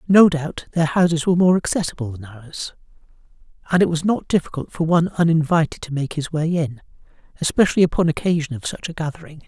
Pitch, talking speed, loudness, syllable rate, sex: 160 Hz, 185 wpm, -20 LUFS, 6.3 syllables/s, male